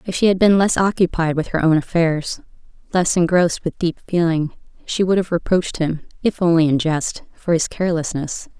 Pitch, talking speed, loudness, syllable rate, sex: 170 Hz, 190 wpm, -19 LUFS, 5.4 syllables/s, female